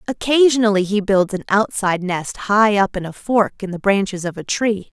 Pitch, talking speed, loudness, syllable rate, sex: 200 Hz, 205 wpm, -18 LUFS, 5.1 syllables/s, female